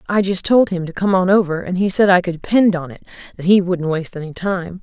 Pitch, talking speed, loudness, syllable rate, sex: 185 Hz, 275 wpm, -17 LUFS, 6.0 syllables/s, female